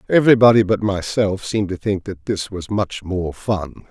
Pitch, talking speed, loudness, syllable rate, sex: 100 Hz, 185 wpm, -19 LUFS, 5.0 syllables/s, male